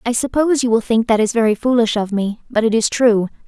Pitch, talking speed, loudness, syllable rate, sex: 230 Hz, 260 wpm, -16 LUFS, 6.1 syllables/s, female